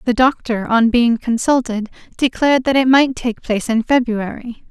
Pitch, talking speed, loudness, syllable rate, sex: 240 Hz, 165 wpm, -16 LUFS, 4.9 syllables/s, female